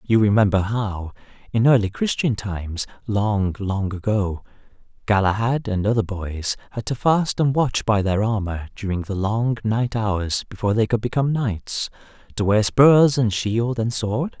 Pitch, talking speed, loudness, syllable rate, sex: 110 Hz, 165 wpm, -21 LUFS, 4.4 syllables/s, male